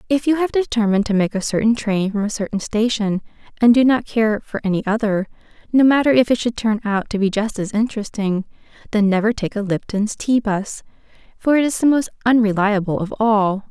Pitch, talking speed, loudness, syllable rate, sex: 220 Hz, 205 wpm, -18 LUFS, 5.6 syllables/s, female